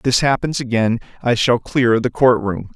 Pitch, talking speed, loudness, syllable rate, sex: 120 Hz, 195 wpm, -17 LUFS, 4.9 syllables/s, male